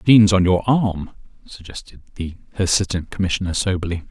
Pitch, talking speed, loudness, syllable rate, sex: 95 Hz, 145 wpm, -19 LUFS, 5.7 syllables/s, male